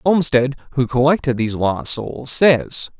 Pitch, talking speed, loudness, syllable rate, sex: 135 Hz, 140 wpm, -18 LUFS, 4.2 syllables/s, male